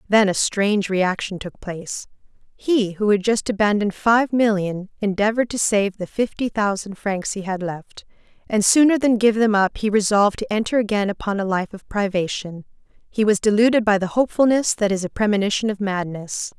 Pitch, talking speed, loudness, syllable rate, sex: 205 Hz, 180 wpm, -20 LUFS, 5.4 syllables/s, female